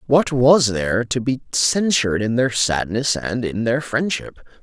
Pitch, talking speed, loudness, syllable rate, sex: 125 Hz, 170 wpm, -19 LUFS, 4.3 syllables/s, male